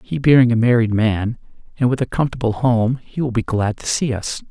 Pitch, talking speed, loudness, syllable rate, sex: 120 Hz, 225 wpm, -18 LUFS, 5.3 syllables/s, male